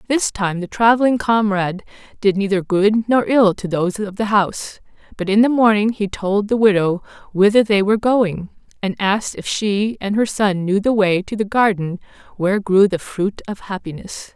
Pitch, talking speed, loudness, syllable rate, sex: 205 Hz, 190 wpm, -17 LUFS, 5.0 syllables/s, female